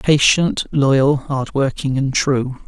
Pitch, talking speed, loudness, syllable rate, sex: 135 Hz, 110 wpm, -17 LUFS, 3.1 syllables/s, male